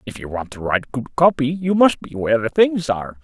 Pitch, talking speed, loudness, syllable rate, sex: 140 Hz, 260 wpm, -19 LUFS, 5.8 syllables/s, male